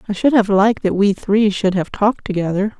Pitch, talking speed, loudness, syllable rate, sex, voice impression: 205 Hz, 235 wpm, -16 LUFS, 5.8 syllables/s, female, feminine, adult-like, intellectual, calm, slightly kind